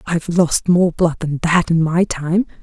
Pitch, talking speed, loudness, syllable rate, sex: 170 Hz, 205 wpm, -16 LUFS, 4.3 syllables/s, female